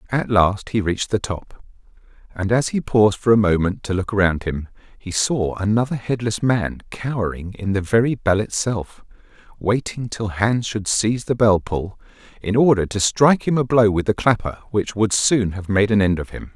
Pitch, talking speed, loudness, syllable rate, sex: 105 Hz, 200 wpm, -20 LUFS, 5.0 syllables/s, male